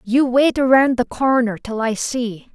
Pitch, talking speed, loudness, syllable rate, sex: 245 Hz, 190 wpm, -18 LUFS, 4.1 syllables/s, female